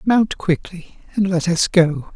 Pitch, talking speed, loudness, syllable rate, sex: 180 Hz, 165 wpm, -18 LUFS, 3.6 syllables/s, male